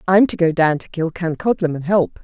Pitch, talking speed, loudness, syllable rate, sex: 170 Hz, 215 wpm, -18 LUFS, 5.5 syllables/s, female